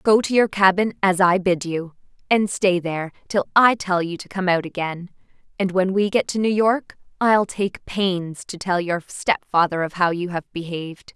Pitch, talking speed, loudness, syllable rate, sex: 185 Hz, 205 wpm, -21 LUFS, 4.6 syllables/s, female